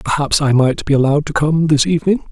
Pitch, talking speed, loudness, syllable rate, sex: 150 Hz, 235 wpm, -15 LUFS, 6.4 syllables/s, male